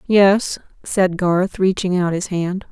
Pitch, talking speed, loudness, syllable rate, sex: 185 Hz, 155 wpm, -18 LUFS, 3.5 syllables/s, female